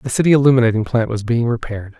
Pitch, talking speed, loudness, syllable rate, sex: 120 Hz, 210 wpm, -16 LUFS, 7.3 syllables/s, male